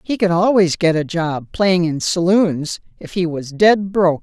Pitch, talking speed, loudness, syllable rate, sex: 175 Hz, 200 wpm, -17 LUFS, 4.3 syllables/s, female